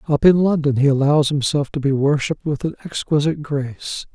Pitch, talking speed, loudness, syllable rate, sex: 145 Hz, 190 wpm, -19 LUFS, 5.7 syllables/s, male